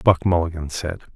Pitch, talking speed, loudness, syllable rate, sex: 85 Hz, 155 wpm, -22 LUFS, 5.3 syllables/s, male